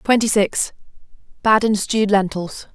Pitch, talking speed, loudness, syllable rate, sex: 210 Hz, 85 wpm, -18 LUFS, 4.7 syllables/s, female